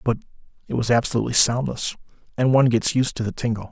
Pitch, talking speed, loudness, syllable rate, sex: 120 Hz, 195 wpm, -21 LUFS, 7.1 syllables/s, male